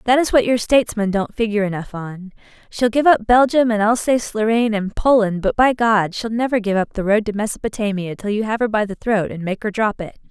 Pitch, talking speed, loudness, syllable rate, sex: 220 Hz, 240 wpm, -18 LUFS, 5.9 syllables/s, female